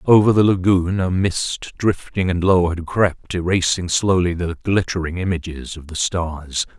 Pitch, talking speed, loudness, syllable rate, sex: 90 Hz, 160 wpm, -19 LUFS, 4.3 syllables/s, male